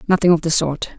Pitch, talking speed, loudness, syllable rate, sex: 165 Hz, 245 wpm, -17 LUFS, 6.8 syllables/s, female